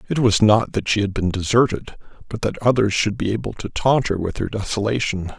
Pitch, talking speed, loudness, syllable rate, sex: 105 Hz, 225 wpm, -20 LUFS, 5.6 syllables/s, male